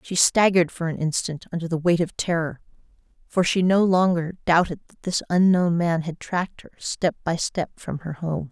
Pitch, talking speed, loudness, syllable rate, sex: 170 Hz, 195 wpm, -23 LUFS, 5.1 syllables/s, female